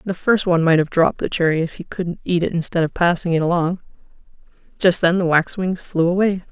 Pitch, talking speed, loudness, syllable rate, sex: 175 Hz, 220 wpm, -19 LUFS, 6.0 syllables/s, female